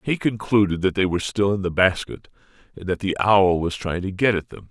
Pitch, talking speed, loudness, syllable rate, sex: 100 Hz, 240 wpm, -21 LUFS, 5.6 syllables/s, male